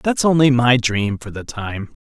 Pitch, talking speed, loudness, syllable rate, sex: 120 Hz, 205 wpm, -17 LUFS, 4.4 syllables/s, male